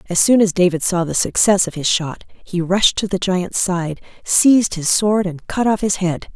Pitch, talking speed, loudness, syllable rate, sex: 185 Hz, 225 wpm, -17 LUFS, 4.7 syllables/s, female